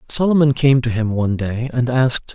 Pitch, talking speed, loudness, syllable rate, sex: 125 Hz, 205 wpm, -17 LUFS, 5.6 syllables/s, male